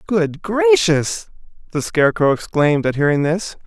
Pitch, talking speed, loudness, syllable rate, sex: 160 Hz, 130 wpm, -17 LUFS, 4.6 syllables/s, male